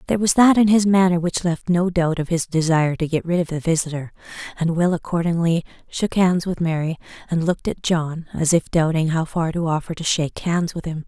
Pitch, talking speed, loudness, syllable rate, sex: 170 Hz, 230 wpm, -20 LUFS, 5.8 syllables/s, female